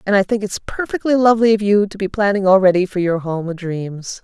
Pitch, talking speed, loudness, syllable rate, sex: 200 Hz, 225 wpm, -17 LUFS, 5.8 syllables/s, female